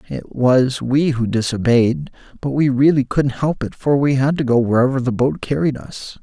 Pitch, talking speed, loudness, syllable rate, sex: 130 Hz, 200 wpm, -17 LUFS, 4.8 syllables/s, male